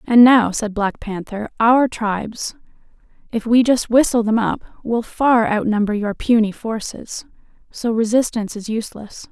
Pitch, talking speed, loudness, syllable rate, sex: 225 Hz, 150 wpm, -18 LUFS, 4.5 syllables/s, female